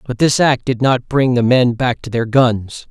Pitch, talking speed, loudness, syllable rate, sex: 125 Hz, 250 wpm, -15 LUFS, 4.3 syllables/s, male